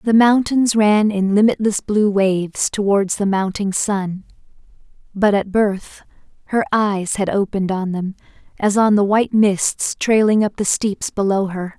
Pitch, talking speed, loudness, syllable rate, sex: 205 Hz, 155 wpm, -17 LUFS, 4.3 syllables/s, female